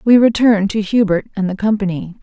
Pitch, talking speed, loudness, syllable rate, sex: 205 Hz, 190 wpm, -15 LUFS, 5.4 syllables/s, female